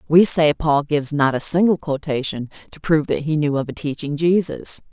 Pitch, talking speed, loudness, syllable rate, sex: 150 Hz, 205 wpm, -19 LUFS, 5.4 syllables/s, female